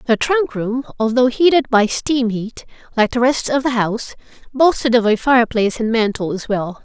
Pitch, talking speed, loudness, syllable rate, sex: 235 Hz, 195 wpm, -17 LUFS, 5.2 syllables/s, female